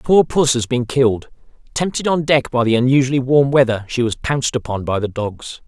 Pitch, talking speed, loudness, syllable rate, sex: 130 Hz, 210 wpm, -17 LUFS, 5.5 syllables/s, male